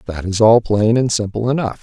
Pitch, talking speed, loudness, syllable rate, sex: 110 Hz, 230 wpm, -15 LUFS, 5.4 syllables/s, male